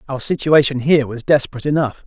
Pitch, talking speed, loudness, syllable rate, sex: 135 Hz, 175 wpm, -16 LUFS, 6.9 syllables/s, male